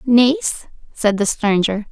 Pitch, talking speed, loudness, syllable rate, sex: 230 Hz, 125 wpm, -17 LUFS, 3.9 syllables/s, female